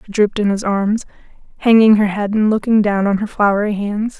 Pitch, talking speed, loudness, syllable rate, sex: 210 Hz, 215 wpm, -15 LUFS, 5.4 syllables/s, female